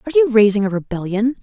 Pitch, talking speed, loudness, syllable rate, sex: 205 Hz, 210 wpm, -16 LUFS, 7.3 syllables/s, female